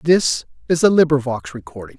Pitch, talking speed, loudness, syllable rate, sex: 135 Hz, 150 wpm, -17 LUFS, 5.3 syllables/s, male